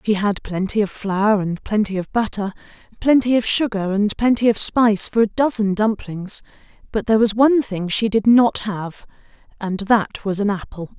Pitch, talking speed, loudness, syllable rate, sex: 210 Hz, 185 wpm, -19 LUFS, 4.9 syllables/s, female